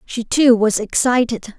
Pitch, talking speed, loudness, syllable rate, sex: 230 Hz, 150 wpm, -16 LUFS, 4.1 syllables/s, female